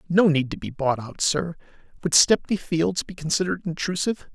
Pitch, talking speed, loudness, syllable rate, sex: 165 Hz, 180 wpm, -23 LUFS, 5.5 syllables/s, male